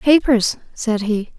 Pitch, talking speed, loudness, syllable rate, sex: 235 Hz, 130 wpm, -18 LUFS, 3.4 syllables/s, female